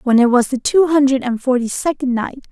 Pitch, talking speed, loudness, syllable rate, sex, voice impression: 260 Hz, 240 wpm, -16 LUFS, 5.7 syllables/s, female, feminine, adult-like, tensed, bright, soft, friendly, reassuring, slightly unique, elegant, lively, kind